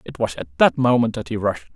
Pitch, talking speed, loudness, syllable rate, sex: 105 Hz, 310 wpm, -20 LUFS, 6.1 syllables/s, male